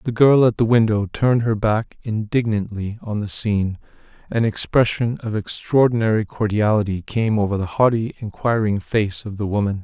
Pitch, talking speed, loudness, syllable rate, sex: 110 Hz, 160 wpm, -20 LUFS, 5.2 syllables/s, male